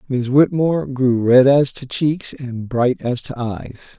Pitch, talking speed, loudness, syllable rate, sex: 130 Hz, 180 wpm, -17 LUFS, 3.9 syllables/s, male